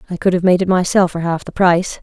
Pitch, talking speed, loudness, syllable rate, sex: 180 Hz, 295 wpm, -15 LUFS, 6.6 syllables/s, female